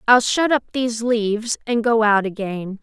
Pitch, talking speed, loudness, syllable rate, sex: 225 Hz, 190 wpm, -19 LUFS, 4.8 syllables/s, female